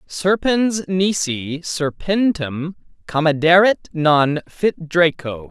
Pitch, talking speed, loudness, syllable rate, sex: 165 Hz, 75 wpm, -18 LUFS, 3.1 syllables/s, male